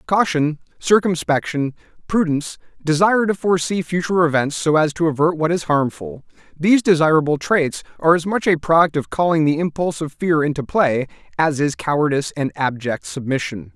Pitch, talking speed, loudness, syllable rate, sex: 160 Hz, 160 wpm, -19 LUFS, 5.7 syllables/s, male